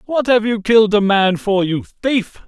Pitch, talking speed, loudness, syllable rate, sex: 210 Hz, 220 wpm, -15 LUFS, 4.6 syllables/s, male